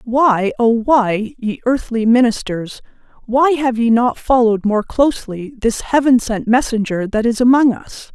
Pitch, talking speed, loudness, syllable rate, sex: 235 Hz, 155 wpm, -15 LUFS, 4.3 syllables/s, female